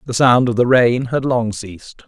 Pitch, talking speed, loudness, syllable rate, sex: 120 Hz, 230 wpm, -15 LUFS, 4.8 syllables/s, male